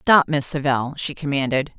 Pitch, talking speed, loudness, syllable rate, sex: 145 Hz, 170 wpm, -21 LUFS, 4.9 syllables/s, female